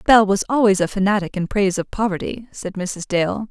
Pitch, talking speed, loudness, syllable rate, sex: 200 Hz, 205 wpm, -20 LUFS, 5.5 syllables/s, female